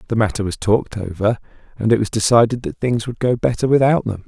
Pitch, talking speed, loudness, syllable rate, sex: 110 Hz, 225 wpm, -18 LUFS, 6.2 syllables/s, male